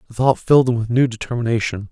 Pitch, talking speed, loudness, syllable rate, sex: 120 Hz, 220 wpm, -18 LUFS, 6.9 syllables/s, male